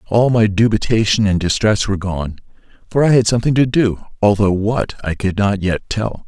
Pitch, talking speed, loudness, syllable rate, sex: 105 Hz, 190 wpm, -16 LUFS, 5.3 syllables/s, male